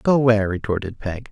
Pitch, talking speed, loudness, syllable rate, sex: 110 Hz, 180 wpm, -21 LUFS, 5.5 syllables/s, male